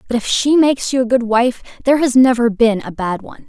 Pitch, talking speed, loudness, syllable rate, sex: 240 Hz, 260 wpm, -15 LUFS, 6.2 syllables/s, female